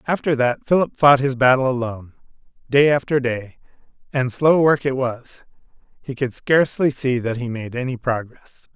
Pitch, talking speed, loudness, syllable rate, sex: 130 Hz, 165 wpm, -19 LUFS, 4.9 syllables/s, male